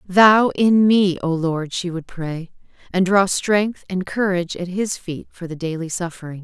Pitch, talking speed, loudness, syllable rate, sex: 180 Hz, 185 wpm, -19 LUFS, 4.3 syllables/s, female